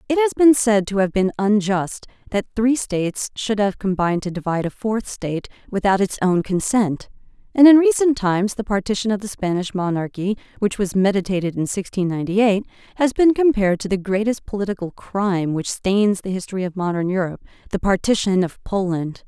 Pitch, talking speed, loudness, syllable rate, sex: 200 Hz, 185 wpm, -20 LUFS, 5.6 syllables/s, female